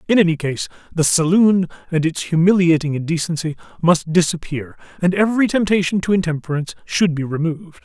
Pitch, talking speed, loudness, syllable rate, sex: 170 Hz, 145 wpm, -18 LUFS, 5.9 syllables/s, male